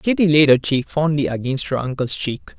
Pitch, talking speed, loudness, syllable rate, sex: 145 Hz, 210 wpm, -18 LUFS, 5.1 syllables/s, male